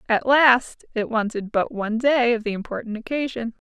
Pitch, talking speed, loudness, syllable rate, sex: 235 Hz, 180 wpm, -22 LUFS, 5.1 syllables/s, female